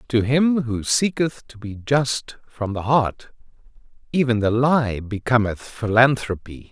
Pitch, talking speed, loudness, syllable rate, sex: 120 Hz, 135 wpm, -21 LUFS, 3.9 syllables/s, male